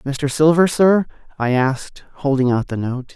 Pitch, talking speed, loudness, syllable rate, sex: 140 Hz, 170 wpm, -17 LUFS, 4.4 syllables/s, male